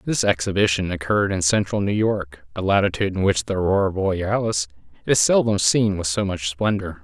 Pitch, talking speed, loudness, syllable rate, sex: 95 Hz, 180 wpm, -21 LUFS, 5.6 syllables/s, male